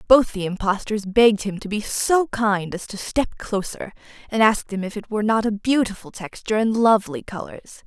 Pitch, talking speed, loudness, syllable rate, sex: 210 Hz, 200 wpm, -21 LUFS, 5.3 syllables/s, female